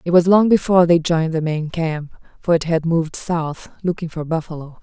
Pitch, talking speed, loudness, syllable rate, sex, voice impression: 165 Hz, 210 wpm, -18 LUFS, 5.5 syllables/s, female, feminine, adult-like, calm, elegant, slightly sweet